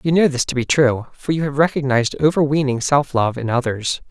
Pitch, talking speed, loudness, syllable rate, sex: 140 Hz, 220 wpm, -18 LUFS, 5.7 syllables/s, male